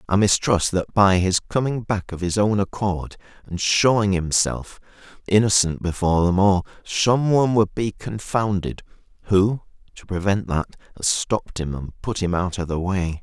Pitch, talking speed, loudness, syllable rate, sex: 100 Hz, 160 wpm, -21 LUFS, 4.7 syllables/s, male